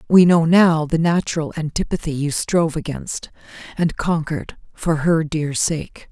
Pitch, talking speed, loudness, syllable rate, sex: 160 Hz, 145 wpm, -19 LUFS, 4.5 syllables/s, female